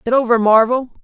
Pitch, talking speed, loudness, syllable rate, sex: 235 Hz, 175 wpm, -14 LUFS, 5.8 syllables/s, female